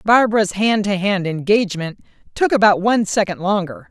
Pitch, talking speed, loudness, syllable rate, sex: 200 Hz, 155 wpm, -17 LUFS, 5.5 syllables/s, female